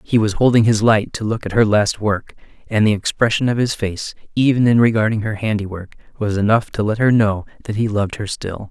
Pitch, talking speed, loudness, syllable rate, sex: 110 Hz, 225 wpm, -17 LUFS, 5.6 syllables/s, male